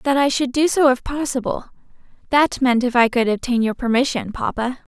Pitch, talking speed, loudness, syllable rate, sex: 255 Hz, 190 wpm, -19 LUFS, 5.4 syllables/s, female